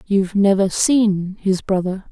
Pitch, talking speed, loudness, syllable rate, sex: 195 Hz, 140 wpm, -18 LUFS, 4.1 syllables/s, female